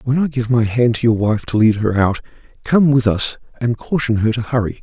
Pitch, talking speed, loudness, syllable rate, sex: 115 Hz, 235 wpm, -17 LUFS, 5.4 syllables/s, male